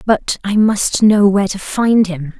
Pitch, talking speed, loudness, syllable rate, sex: 200 Hz, 200 wpm, -14 LUFS, 4.1 syllables/s, female